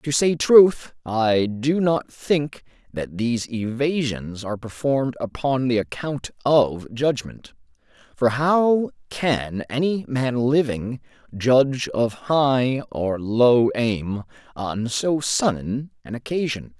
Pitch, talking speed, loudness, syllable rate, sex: 125 Hz, 120 wpm, -22 LUFS, 3.4 syllables/s, male